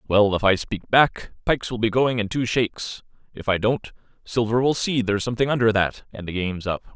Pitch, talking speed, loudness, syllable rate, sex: 110 Hz, 225 wpm, -22 LUFS, 5.8 syllables/s, male